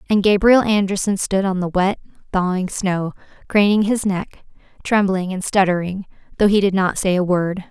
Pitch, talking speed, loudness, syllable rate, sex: 195 Hz, 170 wpm, -18 LUFS, 4.9 syllables/s, female